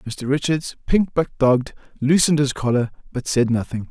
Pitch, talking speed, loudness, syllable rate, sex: 135 Hz, 170 wpm, -20 LUFS, 5.4 syllables/s, male